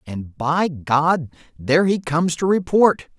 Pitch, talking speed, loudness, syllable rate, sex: 155 Hz, 150 wpm, -19 LUFS, 4.1 syllables/s, male